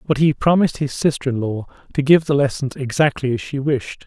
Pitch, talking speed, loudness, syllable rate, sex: 140 Hz, 220 wpm, -19 LUFS, 5.7 syllables/s, male